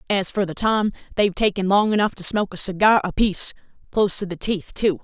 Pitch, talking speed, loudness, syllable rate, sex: 195 Hz, 205 wpm, -21 LUFS, 6.3 syllables/s, female